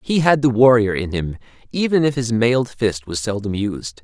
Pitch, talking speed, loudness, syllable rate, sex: 115 Hz, 210 wpm, -18 LUFS, 5.0 syllables/s, male